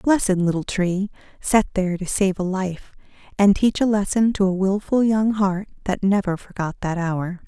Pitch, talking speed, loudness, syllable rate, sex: 195 Hz, 185 wpm, -21 LUFS, 4.8 syllables/s, female